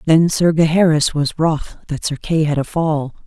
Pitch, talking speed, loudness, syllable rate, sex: 155 Hz, 200 wpm, -17 LUFS, 4.5 syllables/s, female